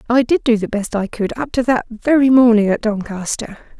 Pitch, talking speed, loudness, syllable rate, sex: 230 Hz, 220 wpm, -16 LUFS, 5.4 syllables/s, female